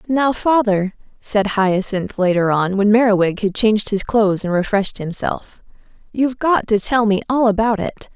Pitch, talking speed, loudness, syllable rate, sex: 210 Hz, 170 wpm, -17 LUFS, 4.9 syllables/s, female